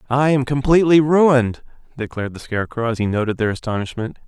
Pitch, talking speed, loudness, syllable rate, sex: 125 Hz, 170 wpm, -18 LUFS, 6.5 syllables/s, male